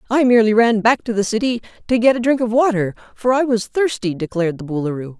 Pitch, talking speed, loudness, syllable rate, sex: 225 Hz, 230 wpm, -17 LUFS, 6.4 syllables/s, female